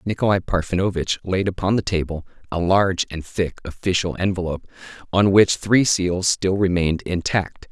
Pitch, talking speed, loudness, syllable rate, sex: 90 Hz, 150 wpm, -20 LUFS, 5.2 syllables/s, male